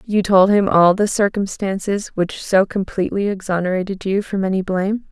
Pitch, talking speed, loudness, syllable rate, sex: 195 Hz, 155 wpm, -18 LUFS, 5.2 syllables/s, female